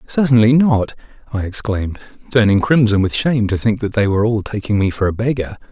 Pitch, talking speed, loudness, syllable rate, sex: 110 Hz, 200 wpm, -16 LUFS, 6.1 syllables/s, male